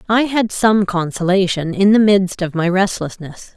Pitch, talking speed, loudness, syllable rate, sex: 190 Hz, 170 wpm, -16 LUFS, 4.5 syllables/s, female